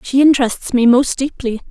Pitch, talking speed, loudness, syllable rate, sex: 260 Hz, 175 wpm, -14 LUFS, 5.2 syllables/s, female